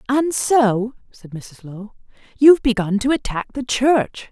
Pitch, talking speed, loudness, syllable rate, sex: 235 Hz, 155 wpm, -17 LUFS, 4.0 syllables/s, female